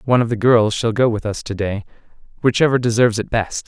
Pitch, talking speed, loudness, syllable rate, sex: 115 Hz, 230 wpm, -18 LUFS, 6.4 syllables/s, male